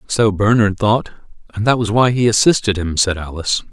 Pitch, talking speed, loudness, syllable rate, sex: 105 Hz, 195 wpm, -16 LUFS, 5.3 syllables/s, male